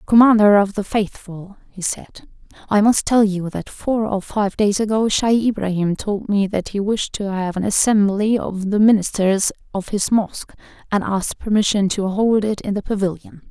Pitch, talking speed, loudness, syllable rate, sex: 205 Hz, 185 wpm, -18 LUFS, 4.7 syllables/s, female